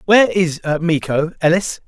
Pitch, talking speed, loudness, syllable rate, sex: 170 Hz, 130 wpm, -17 LUFS, 5.0 syllables/s, male